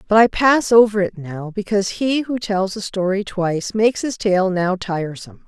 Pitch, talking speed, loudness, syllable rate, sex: 200 Hz, 195 wpm, -18 LUFS, 5.1 syllables/s, female